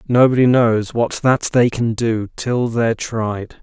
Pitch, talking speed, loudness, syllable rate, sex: 115 Hz, 165 wpm, -17 LUFS, 3.8 syllables/s, male